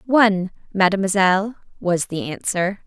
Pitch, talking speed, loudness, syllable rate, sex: 195 Hz, 105 wpm, -20 LUFS, 4.9 syllables/s, female